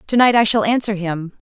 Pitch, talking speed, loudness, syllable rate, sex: 205 Hz, 245 wpm, -16 LUFS, 5.6 syllables/s, female